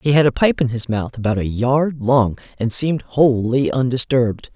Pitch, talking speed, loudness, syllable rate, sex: 125 Hz, 200 wpm, -18 LUFS, 4.9 syllables/s, female